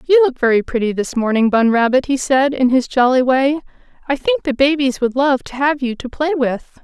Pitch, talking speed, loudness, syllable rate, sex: 265 Hz, 230 wpm, -16 LUFS, 5.2 syllables/s, female